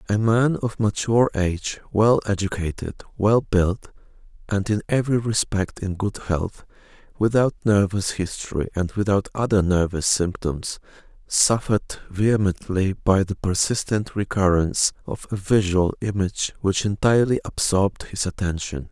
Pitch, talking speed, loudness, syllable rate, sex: 100 Hz, 125 wpm, -22 LUFS, 4.8 syllables/s, male